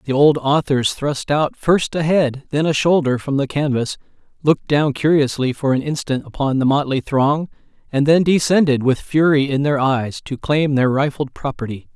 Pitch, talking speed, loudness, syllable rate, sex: 140 Hz, 185 wpm, -18 LUFS, 4.8 syllables/s, male